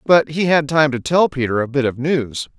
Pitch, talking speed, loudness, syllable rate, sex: 140 Hz, 255 wpm, -17 LUFS, 5.0 syllables/s, male